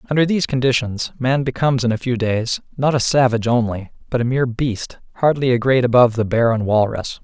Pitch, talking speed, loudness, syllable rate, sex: 125 Hz, 205 wpm, -18 LUFS, 6.3 syllables/s, male